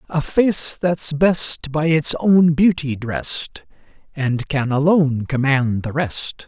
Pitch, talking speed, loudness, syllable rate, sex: 150 Hz, 140 wpm, -18 LUFS, 3.3 syllables/s, male